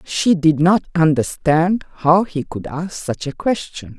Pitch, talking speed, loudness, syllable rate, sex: 165 Hz, 165 wpm, -18 LUFS, 3.9 syllables/s, female